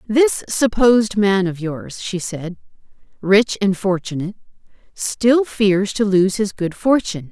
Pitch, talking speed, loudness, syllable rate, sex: 200 Hz, 140 wpm, -18 LUFS, 4.1 syllables/s, female